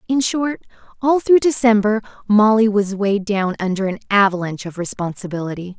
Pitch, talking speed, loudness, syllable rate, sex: 210 Hz, 145 wpm, -18 LUFS, 5.6 syllables/s, female